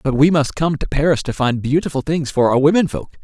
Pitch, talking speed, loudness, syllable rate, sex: 145 Hz, 260 wpm, -17 LUFS, 6.0 syllables/s, male